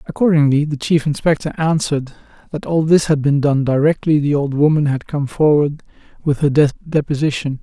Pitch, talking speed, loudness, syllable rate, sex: 150 Hz, 165 wpm, -16 LUFS, 5.2 syllables/s, male